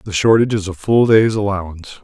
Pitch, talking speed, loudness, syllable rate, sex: 100 Hz, 205 wpm, -15 LUFS, 6.0 syllables/s, male